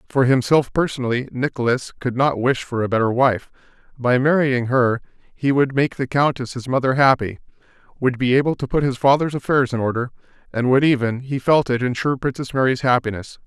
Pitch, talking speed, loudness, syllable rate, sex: 130 Hz, 180 wpm, -19 LUFS, 5.7 syllables/s, male